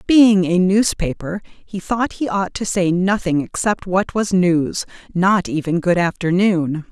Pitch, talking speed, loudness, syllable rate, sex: 185 Hz, 150 wpm, -18 LUFS, 3.9 syllables/s, female